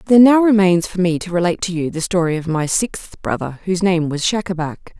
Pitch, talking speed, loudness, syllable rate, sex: 180 Hz, 230 wpm, -17 LUFS, 5.9 syllables/s, female